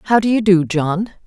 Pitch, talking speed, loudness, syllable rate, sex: 190 Hz, 240 wpm, -16 LUFS, 4.7 syllables/s, female